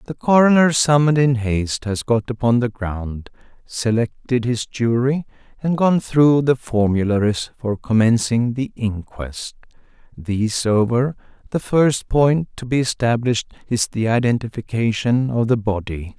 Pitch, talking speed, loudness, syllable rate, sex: 120 Hz, 135 wpm, -19 LUFS, 4.4 syllables/s, male